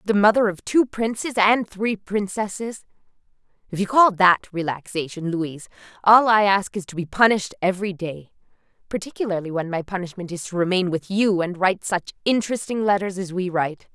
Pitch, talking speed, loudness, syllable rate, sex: 195 Hz, 170 wpm, -21 LUFS, 5.5 syllables/s, female